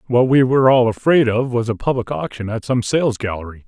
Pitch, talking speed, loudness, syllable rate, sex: 120 Hz, 230 wpm, -17 LUFS, 5.7 syllables/s, male